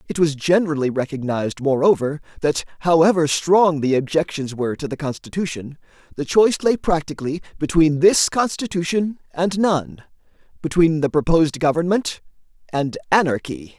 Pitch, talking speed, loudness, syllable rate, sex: 160 Hz, 120 wpm, -19 LUFS, 5.3 syllables/s, male